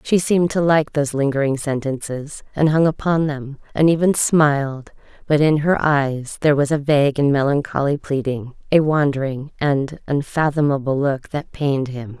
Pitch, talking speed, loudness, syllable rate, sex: 145 Hz, 150 wpm, -19 LUFS, 4.9 syllables/s, female